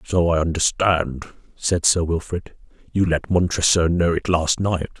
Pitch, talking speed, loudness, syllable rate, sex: 85 Hz, 155 wpm, -20 LUFS, 4.5 syllables/s, male